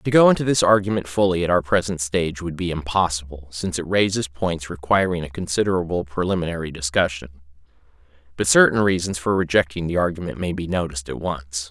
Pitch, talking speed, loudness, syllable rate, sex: 85 Hz, 175 wpm, -21 LUFS, 6.1 syllables/s, male